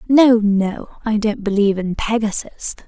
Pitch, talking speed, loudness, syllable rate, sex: 215 Hz, 145 wpm, -18 LUFS, 4.5 syllables/s, female